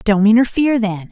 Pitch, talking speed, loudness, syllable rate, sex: 220 Hz, 160 wpm, -14 LUFS, 5.9 syllables/s, female